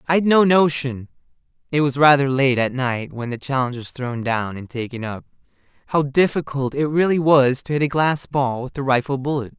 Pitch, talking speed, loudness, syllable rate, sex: 135 Hz, 205 wpm, -20 LUFS, 3.3 syllables/s, male